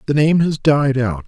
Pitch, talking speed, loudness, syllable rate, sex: 140 Hz, 235 wpm, -16 LUFS, 4.5 syllables/s, male